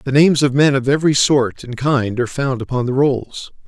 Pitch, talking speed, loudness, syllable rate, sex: 135 Hz, 230 wpm, -16 LUFS, 5.6 syllables/s, male